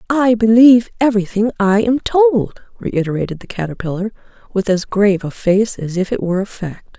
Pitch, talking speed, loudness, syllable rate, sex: 210 Hz, 170 wpm, -15 LUFS, 5.5 syllables/s, female